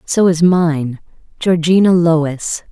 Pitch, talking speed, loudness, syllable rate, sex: 165 Hz, 110 wpm, -14 LUFS, 3.2 syllables/s, female